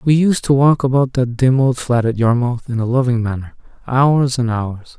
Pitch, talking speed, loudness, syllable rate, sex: 125 Hz, 215 wpm, -16 LUFS, 4.8 syllables/s, male